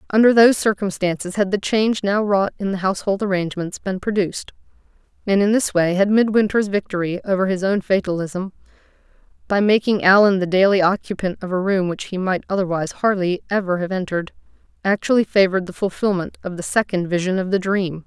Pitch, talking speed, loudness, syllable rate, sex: 190 Hz, 170 wpm, -19 LUFS, 6.0 syllables/s, female